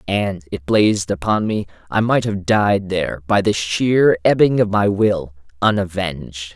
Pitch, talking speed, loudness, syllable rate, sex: 100 Hz, 155 wpm, -18 LUFS, 4.3 syllables/s, male